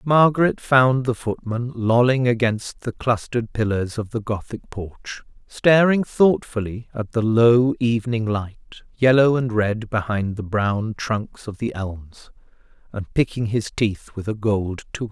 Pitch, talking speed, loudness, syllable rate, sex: 115 Hz, 150 wpm, -21 LUFS, 4.1 syllables/s, male